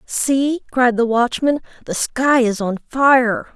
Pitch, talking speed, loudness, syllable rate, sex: 245 Hz, 150 wpm, -17 LUFS, 3.4 syllables/s, female